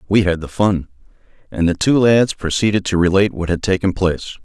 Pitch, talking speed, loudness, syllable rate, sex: 95 Hz, 205 wpm, -17 LUFS, 5.9 syllables/s, male